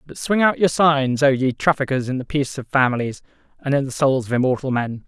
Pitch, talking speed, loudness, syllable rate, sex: 135 Hz, 235 wpm, -19 LUFS, 5.9 syllables/s, male